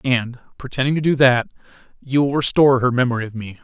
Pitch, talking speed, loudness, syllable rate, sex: 130 Hz, 200 wpm, -18 LUFS, 6.3 syllables/s, male